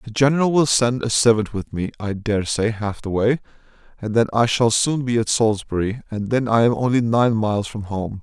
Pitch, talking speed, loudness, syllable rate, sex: 115 Hz, 220 wpm, -20 LUFS, 5.4 syllables/s, male